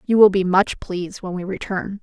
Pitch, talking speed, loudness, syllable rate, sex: 190 Hz, 235 wpm, -20 LUFS, 5.2 syllables/s, female